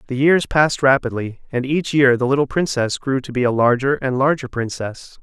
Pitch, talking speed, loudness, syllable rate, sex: 130 Hz, 205 wpm, -18 LUFS, 5.3 syllables/s, male